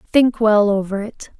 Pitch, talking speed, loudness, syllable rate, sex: 215 Hz, 170 wpm, -17 LUFS, 4.1 syllables/s, female